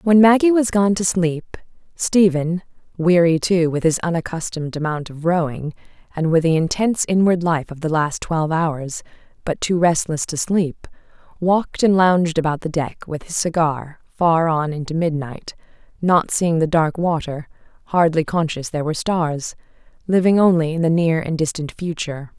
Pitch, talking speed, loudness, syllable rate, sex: 165 Hz, 165 wpm, -19 LUFS, 4.9 syllables/s, female